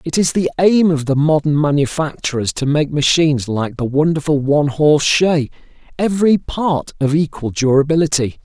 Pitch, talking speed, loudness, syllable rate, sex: 150 Hz, 155 wpm, -16 LUFS, 5.2 syllables/s, male